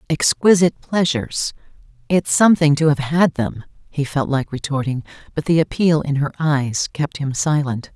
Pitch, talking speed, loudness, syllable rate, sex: 150 Hz, 150 wpm, -18 LUFS, 4.9 syllables/s, female